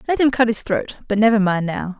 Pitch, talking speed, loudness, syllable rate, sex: 220 Hz, 240 wpm, -18 LUFS, 5.7 syllables/s, female